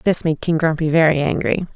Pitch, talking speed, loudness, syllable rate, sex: 160 Hz, 205 wpm, -18 LUFS, 5.4 syllables/s, female